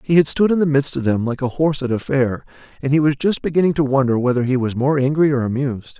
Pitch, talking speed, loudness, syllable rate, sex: 135 Hz, 280 wpm, -18 LUFS, 6.5 syllables/s, male